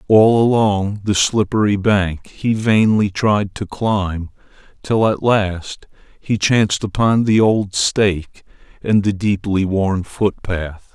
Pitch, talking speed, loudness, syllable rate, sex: 100 Hz, 130 wpm, -17 LUFS, 3.4 syllables/s, male